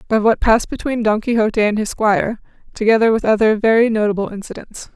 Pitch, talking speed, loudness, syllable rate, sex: 220 Hz, 180 wpm, -16 LUFS, 6.4 syllables/s, female